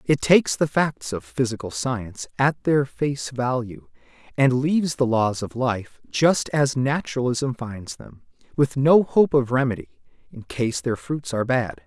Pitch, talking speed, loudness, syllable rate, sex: 130 Hz, 165 wpm, -22 LUFS, 4.3 syllables/s, male